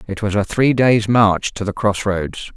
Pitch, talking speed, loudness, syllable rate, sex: 105 Hz, 235 wpm, -17 LUFS, 4.2 syllables/s, male